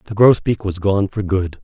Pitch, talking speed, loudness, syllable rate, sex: 100 Hz, 220 wpm, -17 LUFS, 4.9 syllables/s, male